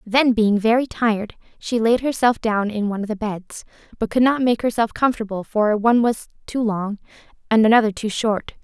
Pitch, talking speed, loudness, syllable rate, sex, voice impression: 225 Hz, 195 wpm, -20 LUFS, 5.4 syllables/s, female, slightly gender-neutral, young, tensed, bright, soft, slightly muffled, slightly cute, friendly, reassuring, lively, kind